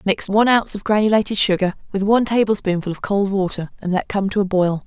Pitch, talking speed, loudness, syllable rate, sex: 200 Hz, 220 wpm, -18 LUFS, 6.4 syllables/s, female